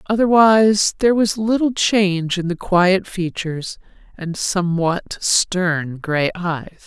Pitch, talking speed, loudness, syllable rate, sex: 185 Hz, 120 wpm, -18 LUFS, 3.9 syllables/s, female